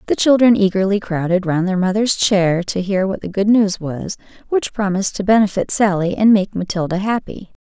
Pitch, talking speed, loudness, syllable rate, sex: 195 Hz, 190 wpm, -17 LUFS, 5.3 syllables/s, female